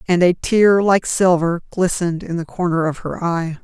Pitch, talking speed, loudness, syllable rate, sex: 175 Hz, 200 wpm, -17 LUFS, 4.8 syllables/s, female